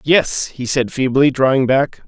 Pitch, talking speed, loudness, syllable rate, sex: 135 Hz, 175 wpm, -16 LUFS, 4.2 syllables/s, male